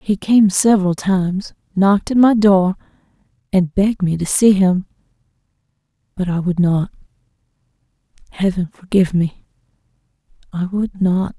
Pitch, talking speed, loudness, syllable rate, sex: 185 Hz, 125 wpm, -16 LUFS, 5.0 syllables/s, female